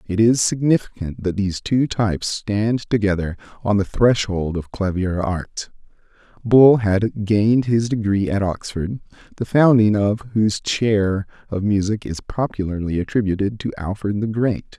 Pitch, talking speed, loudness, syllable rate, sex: 105 Hz, 145 wpm, -19 LUFS, 4.5 syllables/s, male